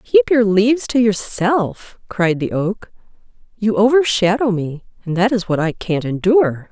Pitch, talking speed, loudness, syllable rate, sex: 205 Hz, 160 wpm, -17 LUFS, 4.4 syllables/s, female